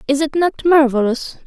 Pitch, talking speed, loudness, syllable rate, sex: 285 Hz, 165 wpm, -16 LUFS, 5.5 syllables/s, female